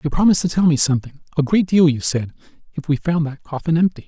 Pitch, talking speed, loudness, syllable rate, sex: 155 Hz, 220 wpm, -18 LUFS, 6.8 syllables/s, male